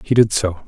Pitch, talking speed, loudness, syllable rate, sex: 105 Hz, 265 wpm, -17 LUFS, 5.7 syllables/s, male